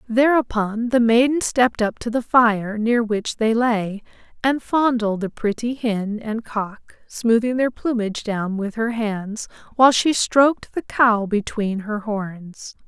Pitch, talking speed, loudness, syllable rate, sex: 225 Hz, 160 wpm, -20 LUFS, 3.9 syllables/s, female